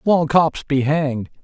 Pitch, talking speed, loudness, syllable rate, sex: 150 Hz, 165 wpm, -18 LUFS, 3.9 syllables/s, male